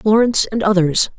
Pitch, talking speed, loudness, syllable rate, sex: 205 Hz, 150 wpm, -15 LUFS, 5.7 syllables/s, female